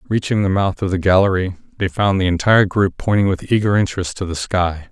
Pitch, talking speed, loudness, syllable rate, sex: 95 Hz, 220 wpm, -17 LUFS, 6.0 syllables/s, male